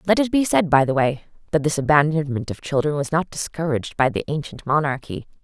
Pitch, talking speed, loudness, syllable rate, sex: 150 Hz, 210 wpm, -21 LUFS, 6.0 syllables/s, female